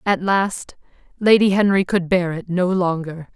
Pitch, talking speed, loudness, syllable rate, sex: 185 Hz, 160 wpm, -18 LUFS, 4.3 syllables/s, female